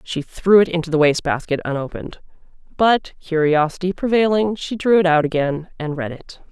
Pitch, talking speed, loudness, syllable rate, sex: 170 Hz, 175 wpm, -18 LUFS, 5.5 syllables/s, female